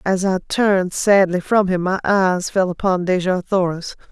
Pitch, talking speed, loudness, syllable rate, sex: 185 Hz, 175 wpm, -18 LUFS, 4.7 syllables/s, female